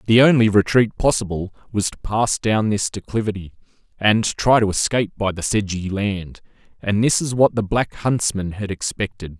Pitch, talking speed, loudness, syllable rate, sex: 105 Hz, 170 wpm, -20 LUFS, 4.9 syllables/s, male